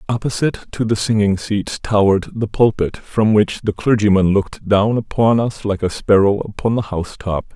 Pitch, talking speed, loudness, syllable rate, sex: 105 Hz, 185 wpm, -17 LUFS, 5.2 syllables/s, male